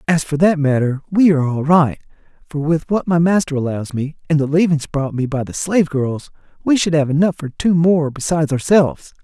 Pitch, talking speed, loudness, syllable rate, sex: 155 Hz, 215 wpm, -17 LUFS, 5.5 syllables/s, male